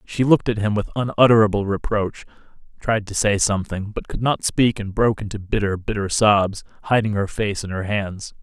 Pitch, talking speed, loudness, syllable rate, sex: 105 Hz, 190 wpm, -20 LUFS, 5.4 syllables/s, male